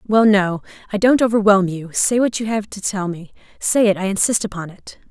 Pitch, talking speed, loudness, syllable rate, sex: 205 Hz, 210 wpm, -18 LUFS, 5.4 syllables/s, female